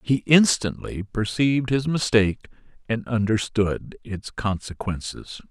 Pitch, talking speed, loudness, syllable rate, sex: 115 Hz, 100 wpm, -23 LUFS, 4.3 syllables/s, male